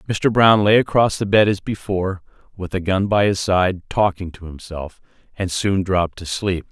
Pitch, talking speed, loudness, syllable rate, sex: 95 Hz, 195 wpm, -18 LUFS, 4.8 syllables/s, male